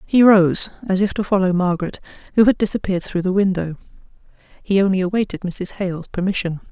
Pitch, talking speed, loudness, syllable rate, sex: 190 Hz, 170 wpm, -19 LUFS, 6.2 syllables/s, female